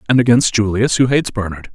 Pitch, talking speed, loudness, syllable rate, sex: 115 Hz, 205 wpm, -15 LUFS, 6.4 syllables/s, male